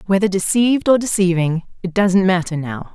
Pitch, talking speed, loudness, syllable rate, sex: 190 Hz, 165 wpm, -17 LUFS, 5.4 syllables/s, female